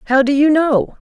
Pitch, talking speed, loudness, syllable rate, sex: 280 Hz, 225 wpm, -14 LUFS, 4.9 syllables/s, female